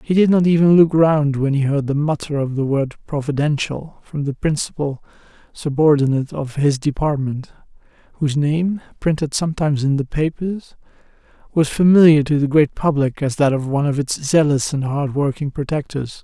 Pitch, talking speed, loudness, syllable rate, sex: 145 Hz, 165 wpm, -18 LUFS, 5.2 syllables/s, male